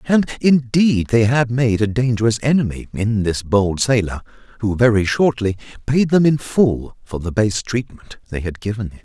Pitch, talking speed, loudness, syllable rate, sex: 115 Hz, 180 wpm, -18 LUFS, 4.7 syllables/s, male